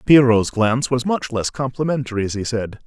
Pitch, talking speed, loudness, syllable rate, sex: 125 Hz, 190 wpm, -19 LUFS, 5.6 syllables/s, male